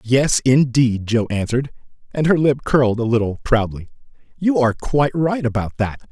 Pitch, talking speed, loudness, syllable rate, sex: 125 Hz, 165 wpm, -18 LUFS, 5.3 syllables/s, male